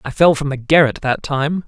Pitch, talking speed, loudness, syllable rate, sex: 145 Hz, 250 wpm, -16 LUFS, 5.2 syllables/s, male